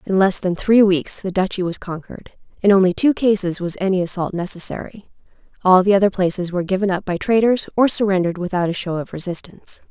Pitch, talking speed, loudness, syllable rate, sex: 190 Hz, 200 wpm, -18 LUFS, 6.2 syllables/s, female